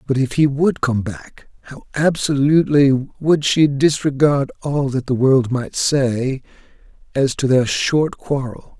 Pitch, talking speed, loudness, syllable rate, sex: 135 Hz, 150 wpm, -17 LUFS, 3.9 syllables/s, male